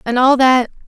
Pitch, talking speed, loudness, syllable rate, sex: 255 Hz, 205 wpm, -13 LUFS, 5.0 syllables/s, female